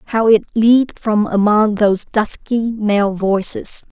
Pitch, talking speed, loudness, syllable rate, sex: 215 Hz, 135 wpm, -15 LUFS, 3.8 syllables/s, female